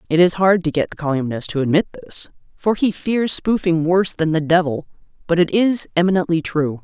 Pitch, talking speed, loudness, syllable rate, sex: 170 Hz, 200 wpm, -18 LUFS, 5.5 syllables/s, female